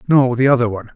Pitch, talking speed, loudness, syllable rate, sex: 125 Hz, 250 wpm, -15 LUFS, 7.6 syllables/s, male